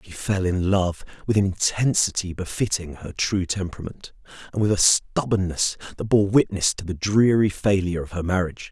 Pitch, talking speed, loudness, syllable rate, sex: 95 Hz, 170 wpm, -22 LUFS, 5.3 syllables/s, male